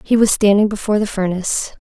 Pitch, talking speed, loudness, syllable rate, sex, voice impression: 205 Hz, 195 wpm, -16 LUFS, 6.6 syllables/s, female, feminine, adult-like, tensed, powerful, fluent, slightly raspy, intellectual, friendly, lively, sharp